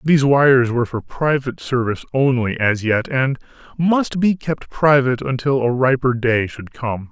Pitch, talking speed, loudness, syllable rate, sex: 130 Hz, 170 wpm, -18 LUFS, 4.9 syllables/s, male